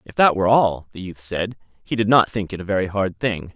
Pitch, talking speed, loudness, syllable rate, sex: 100 Hz, 270 wpm, -20 LUFS, 5.7 syllables/s, male